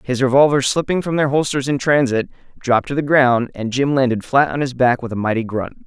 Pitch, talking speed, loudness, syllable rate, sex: 130 Hz, 235 wpm, -17 LUFS, 5.8 syllables/s, male